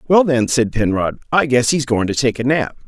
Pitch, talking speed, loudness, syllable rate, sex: 130 Hz, 250 wpm, -17 LUFS, 5.2 syllables/s, male